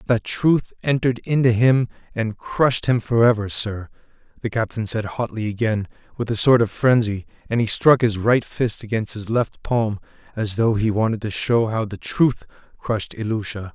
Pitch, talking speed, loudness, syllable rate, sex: 110 Hz, 185 wpm, -21 LUFS, 4.9 syllables/s, male